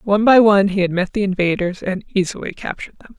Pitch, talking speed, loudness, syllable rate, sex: 195 Hz, 225 wpm, -17 LUFS, 6.6 syllables/s, female